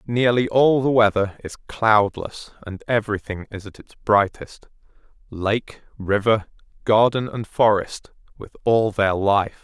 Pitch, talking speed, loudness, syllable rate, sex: 110 Hz, 125 wpm, -20 LUFS, 4.0 syllables/s, male